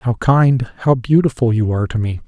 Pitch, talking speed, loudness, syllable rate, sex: 120 Hz, 210 wpm, -16 LUFS, 5.0 syllables/s, male